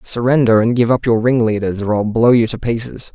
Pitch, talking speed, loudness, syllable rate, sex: 115 Hz, 230 wpm, -15 LUFS, 5.6 syllables/s, male